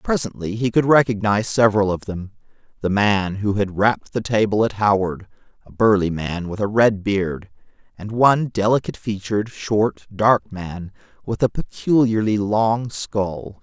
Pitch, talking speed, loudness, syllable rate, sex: 105 Hz, 155 wpm, -20 LUFS, 4.6 syllables/s, male